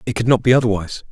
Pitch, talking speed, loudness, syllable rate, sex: 115 Hz, 270 wpm, -17 LUFS, 8.4 syllables/s, male